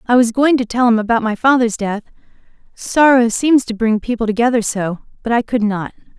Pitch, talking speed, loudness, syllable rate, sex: 230 Hz, 205 wpm, -15 LUFS, 5.5 syllables/s, female